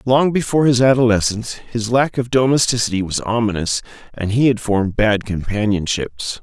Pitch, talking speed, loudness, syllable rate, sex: 115 Hz, 150 wpm, -17 LUFS, 5.4 syllables/s, male